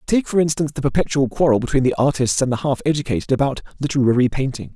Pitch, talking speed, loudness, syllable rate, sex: 135 Hz, 200 wpm, -19 LUFS, 7.1 syllables/s, male